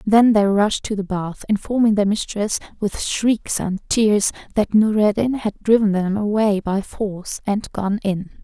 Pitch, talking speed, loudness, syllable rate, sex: 205 Hz, 170 wpm, -19 LUFS, 4.3 syllables/s, female